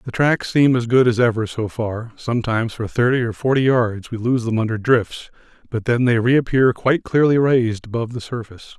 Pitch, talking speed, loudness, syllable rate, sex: 120 Hz, 205 wpm, -19 LUFS, 5.5 syllables/s, male